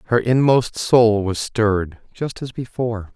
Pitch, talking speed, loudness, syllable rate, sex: 115 Hz, 150 wpm, -19 LUFS, 4.3 syllables/s, male